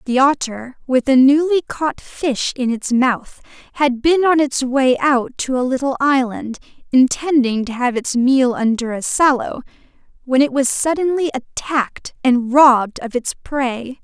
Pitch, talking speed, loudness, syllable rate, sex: 265 Hz, 160 wpm, -17 LUFS, 4.2 syllables/s, female